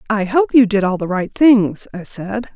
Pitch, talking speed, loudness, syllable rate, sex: 215 Hz, 235 wpm, -16 LUFS, 4.4 syllables/s, female